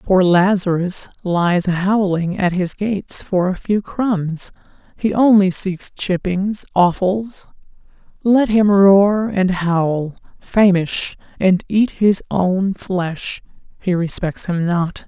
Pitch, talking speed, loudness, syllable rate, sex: 190 Hz, 125 wpm, -17 LUFS, 3.2 syllables/s, female